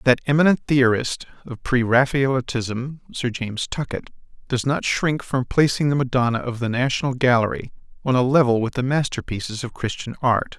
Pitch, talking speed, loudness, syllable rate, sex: 130 Hz, 165 wpm, -21 LUFS, 5.3 syllables/s, male